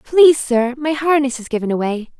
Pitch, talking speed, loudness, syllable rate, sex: 265 Hz, 190 wpm, -16 LUFS, 5.4 syllables/s, female